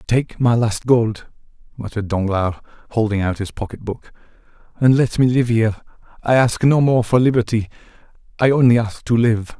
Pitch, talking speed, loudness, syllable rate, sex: 115 Hz, 165 wpm, -18 LUFS, 5.3 syllables/s, male